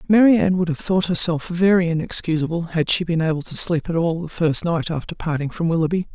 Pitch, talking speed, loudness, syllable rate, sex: 170 Hz, 215 wpm, -20 LUFS, 5.9 syllables/s, female